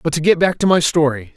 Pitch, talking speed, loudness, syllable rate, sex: 160 Hz, 310 wpm, -16 LUFS, 6.4 syllables/s, male